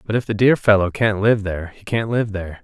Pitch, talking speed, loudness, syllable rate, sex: 105 Hz, 275 wpm, -19 LUFS, 6.0 syllables/s, male